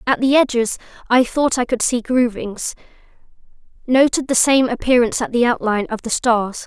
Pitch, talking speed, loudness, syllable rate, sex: 245 Hz, 170 wpm, -17 LUFS, 5.3 syllables/s, female